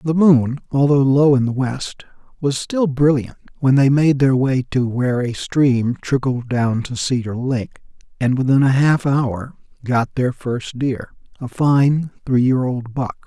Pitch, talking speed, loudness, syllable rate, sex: 130 Hz, 175 wpm, -18 LUFS, 4.0 syllables/s, male